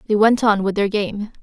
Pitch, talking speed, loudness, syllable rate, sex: 210 Hz, 255 wpm, -18 LUFS, 5.1 syllables/s, female